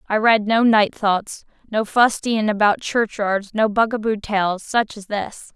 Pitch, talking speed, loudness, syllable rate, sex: 215 Hz, 130 wpm, -19 LUFS, 4.0 syllables/s, female